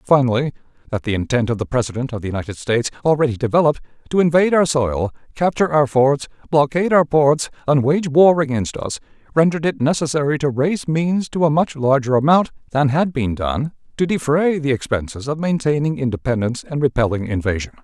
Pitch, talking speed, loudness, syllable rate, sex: 140 Hz, 180 wpm, -18 LUFS, 6.1 syllables/s, male